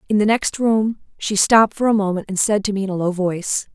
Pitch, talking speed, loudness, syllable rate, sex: 205 Hz, 275 wpm, -18 LUFS, 6.0 syllables/s, female